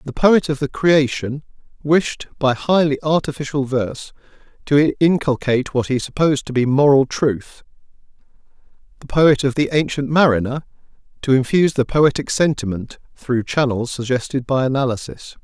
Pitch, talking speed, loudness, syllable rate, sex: 140 Hz, 135 wpm, -18 LUFS, 5.1 syllables/s, male